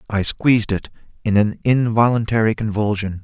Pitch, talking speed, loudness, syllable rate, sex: 110 Hz, 130 wpm, -18 LUFS, 5.3 syllables/s, male